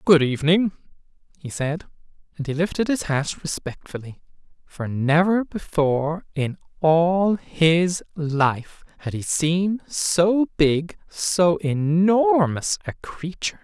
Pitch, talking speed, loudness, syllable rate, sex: 165 Hz, 115 wpm, -21 LUFS, 3.6 syllables/s, male